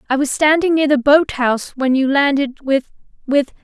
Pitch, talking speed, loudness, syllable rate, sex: 280 Hz, 180 wpm, -16 LUFS, 5.2 syllables/s, female